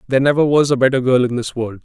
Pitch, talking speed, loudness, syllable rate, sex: 130 Hz, 295 wpm, -16 LUFS, 7.2 syllables/s, male